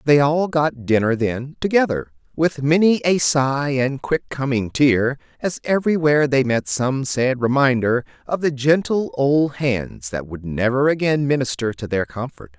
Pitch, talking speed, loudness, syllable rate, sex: 135 Hz, 160 wpm, -19 LUFS, 4.4 syllables/s, male